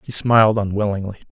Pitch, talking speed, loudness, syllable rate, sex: 105 Hz, 135 wpm, -17 LUFS, 6.4 syllables/s, male